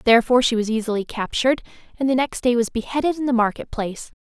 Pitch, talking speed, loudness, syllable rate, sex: 240 Hz, 210 wpm, -21 LUFS, 7.1 syllables/s, female